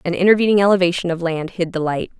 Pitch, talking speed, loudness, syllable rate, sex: 180 Hz, 220 wpm, -17 LUFS, 6.8 syllables/s, female